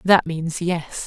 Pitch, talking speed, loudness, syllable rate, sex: 170 Hz, 170 wpm, -22 LUFS, 3.1 syllables/s, female